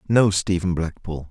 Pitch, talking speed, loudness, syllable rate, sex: 90 Hz, 140 wpm, -21 LUFS, 4.4 syllables/s, male